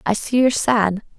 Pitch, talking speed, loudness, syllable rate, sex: 225 Hz, 200 wpm, -18 LUFS, 5.3 syllables/s, female